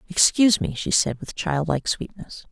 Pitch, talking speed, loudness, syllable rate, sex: 165 Hz, 165 wpm, -22 LUFS, 5.3 syllables/s, female